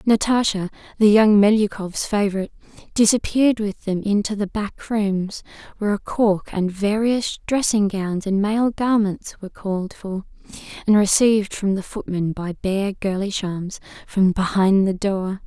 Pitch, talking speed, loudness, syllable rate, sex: 200 Hz, 145 wpm, -20 LUFS, 4.6 syllables/s, female